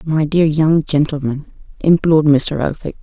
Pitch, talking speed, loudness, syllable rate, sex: 155 Hz, 140 wpm, -15 LUFS, 4.7 syllables/s, female